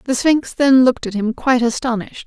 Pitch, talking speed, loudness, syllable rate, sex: 250 Hz, 210 wpm, -16 LUFS, 6.0 syllables/s, female